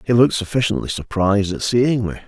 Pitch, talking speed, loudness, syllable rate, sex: 110 Hz, 185 wpm, -18 LUFS, 6.4 syllables/s, male